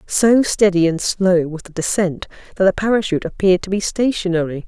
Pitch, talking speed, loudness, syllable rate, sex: 185 Hz, 180 wpm, -17 LUFS, 5.7 syllables/s, female